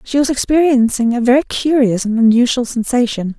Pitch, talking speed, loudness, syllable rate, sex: 245 Hz, 160 wpm, -14 LUFS, 5.5 syllables/s, female